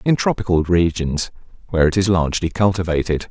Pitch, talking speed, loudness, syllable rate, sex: 90 Hz, 145 wpm, -19 LUFS, 6.0 syllables/s, male